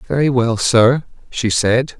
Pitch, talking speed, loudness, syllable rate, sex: 120 Hz, 150 wpm, -15 LUFS, 3.8 syllables/s, male